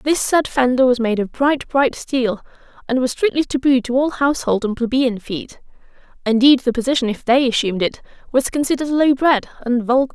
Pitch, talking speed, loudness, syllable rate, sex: 255 Hz, 190 wpm, -18 LUFS, 5.5 syllables/s, female